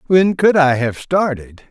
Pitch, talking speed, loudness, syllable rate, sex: 155 Hz, 175 wpm, -15 LUFS, 3.9 syllables/s, male